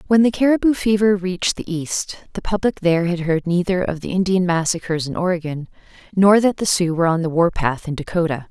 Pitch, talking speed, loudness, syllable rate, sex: 180 Hz, 210 wpm, -19 LUFS, 5.8 syllables/s, female